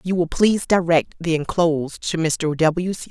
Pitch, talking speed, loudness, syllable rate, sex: 170 Hz, 195 wpm, -20 LUFS, 4.7 syllables/s, female